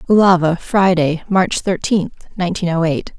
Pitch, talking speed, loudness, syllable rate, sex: 180 Hz, 130 wpm, -16 LUFS, 4.8 syllables/s, female